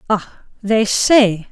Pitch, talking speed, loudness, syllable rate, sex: 215 Hz, 120 wpm, -15 LUFS, 2.6 syllables/s, female